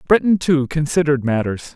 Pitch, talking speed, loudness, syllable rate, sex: 150 Hz, 135 wpm, -18 LUFS, 5.7 syllables/s, male